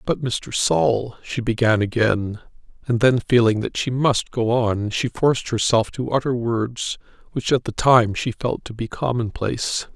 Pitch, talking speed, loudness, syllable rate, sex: 120 Hz, 175 wpm, -21 LUFS, 4.3 syllables/s, male